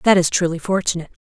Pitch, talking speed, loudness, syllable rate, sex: 175 Hz, 195 wpm, -19 LUFS, 7.3 syllables/s, female